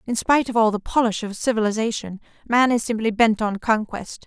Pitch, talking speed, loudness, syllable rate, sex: 225 Hz, 195 wpm, -21 LUFS, 5.7 syllables/s, female